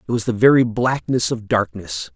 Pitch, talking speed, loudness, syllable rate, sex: 115 Hz, 195 wpm, -18 LUFS, 5.0 syllables/s, male